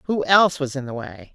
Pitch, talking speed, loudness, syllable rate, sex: 150 Hz, 270 wpm, -19 LUFS, 5.9 syllables/s, female